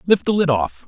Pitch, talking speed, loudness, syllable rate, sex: 170 Hz, 275 wpm, -18 LUFS, 5.6 syllables/s, male